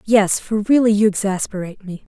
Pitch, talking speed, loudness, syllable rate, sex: 205 Hz, 170 wpm, -17 LUFS, 5.6 syllables/s, female